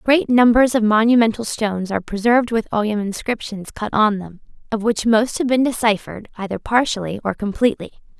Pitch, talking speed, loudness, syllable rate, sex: 220 Hz, 170 wpm, -18 LUFS, 5.8 syllables/s, female